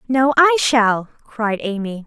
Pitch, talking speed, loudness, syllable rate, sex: 235 Hz, 145 wpm, -17 LUFS, 3.6 syllables/s, female